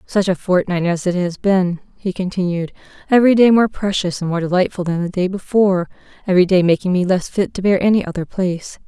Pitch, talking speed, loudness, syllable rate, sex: 185 Hz, 205 wpm, -17 LUFS, 6.0 syllables/s, female